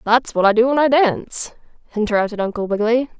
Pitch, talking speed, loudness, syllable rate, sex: 230 Hz, 190 wpm, -18 LUFS, 6.6 syllables/s, female